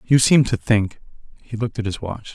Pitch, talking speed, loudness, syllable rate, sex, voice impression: 110 Hz, 230 wpm, -20 LUFS, 5.5 syllables/s, male, very masculine, very middle-aged, very thick, very relaxed, very weak, very dark, very soft, very muffled, halting, very cool, intellectual, very sincere, very calm, very mature, very friendly, reassuring, very unique, very elegant, wild, very sweet, slightly lively, very kind, modest